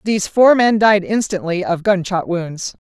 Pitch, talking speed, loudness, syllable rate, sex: 195 Hz, 165 wpm, -16 LUFS, 4.5 syllables/s, female